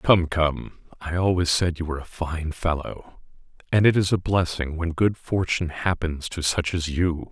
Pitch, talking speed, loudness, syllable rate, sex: 85 Hz, 190 wpm, -24 LUFS, 4.6 syllables/s, male